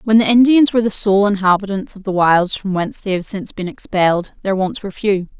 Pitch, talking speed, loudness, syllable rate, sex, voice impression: 200 Hz, 235 wpm, -16 LUFS, 6.0 syllables/s, female, feminine, slightly gender-neutral, slightly young, slightly adult-like, slightly thin, tensed, slightly powerful, slightly bright, hard, clear, fluent, slightly cool, very intellectual, very refreshing, sincere, calm, very friendly, reassuring, slightly unique, elegant, slightly wild, slightly lively, kind, slightly sharp, slightly modest